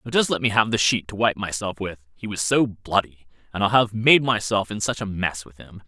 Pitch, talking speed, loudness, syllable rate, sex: 100 Hz, 245 wpm, -22 LUFS, 5.3 syllables/s, male